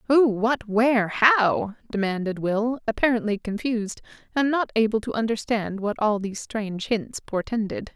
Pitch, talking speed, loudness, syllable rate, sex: 220 Hz, 120 wpm, -24 LUFS, 4.8 syllables/s, female